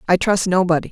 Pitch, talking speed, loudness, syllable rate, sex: 180 Hz, 195 wpm, -17 LUFS, 6.7 syllables/s, female